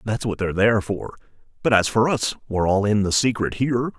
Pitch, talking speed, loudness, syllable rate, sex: 110 Hz, 210 wpm, -21 LUFS, 6.3 syllables/s, male